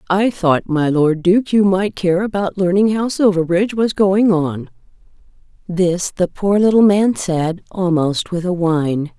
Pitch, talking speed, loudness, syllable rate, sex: 185 Hz, 165 wpm, -16 LUFS, 4.2 syllables/s, female